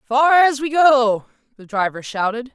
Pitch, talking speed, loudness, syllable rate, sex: 250 Hz, 165 wpm, -17 LUFS, 4.3 syllables/s, female